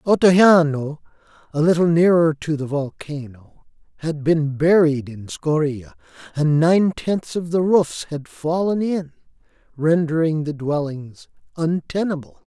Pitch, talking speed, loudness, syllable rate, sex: 160 Hz, 120 wpm, -19 LUFS, 4.0 syllables/s, male